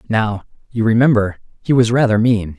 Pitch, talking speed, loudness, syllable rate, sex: 110 Hz, 160 wpm, -15 LUFS, 5.2 syllables/s, male